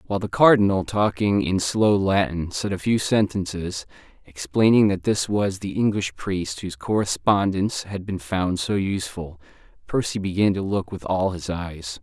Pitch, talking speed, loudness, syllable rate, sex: 95 Hz, 165 wpm, -22 LUFS, 4.7 syllables/s, male